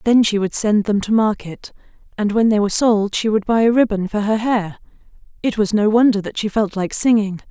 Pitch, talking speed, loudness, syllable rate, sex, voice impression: 210 Hz, 230 wpm, -17 LUFS, 5.5 syllables/s, female, very feminine, slightly adult-like, thin, very tensed, slightly powerful, very bright, hard, very clear, fluent, slightly raspy, cool, very intellectual, refreshing, sincere, calm, friendly, reassuring, very unique, elegant, wild, slightly sweet, very lively, strict, intense, slightly sharp